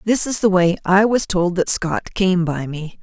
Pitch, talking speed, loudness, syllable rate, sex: 185 Hz, 240 wpm, -18 LUFS, 4.4 syllables/s, female